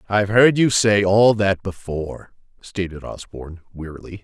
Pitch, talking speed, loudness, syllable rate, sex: 100 Hz, 140 wpm, -18 LUFS, 4.9 syllables/s, male